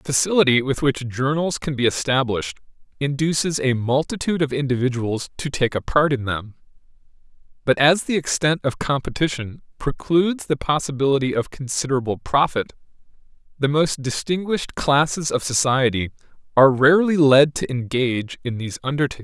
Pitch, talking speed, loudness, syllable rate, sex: 140 Hz, 140 wpm, -20 LUFS, 5.6 syllables/s, male